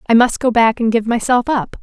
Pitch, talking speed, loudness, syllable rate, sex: 235 Hz, 260 wpm, -15 LUFS, 5.7 syllables/s, female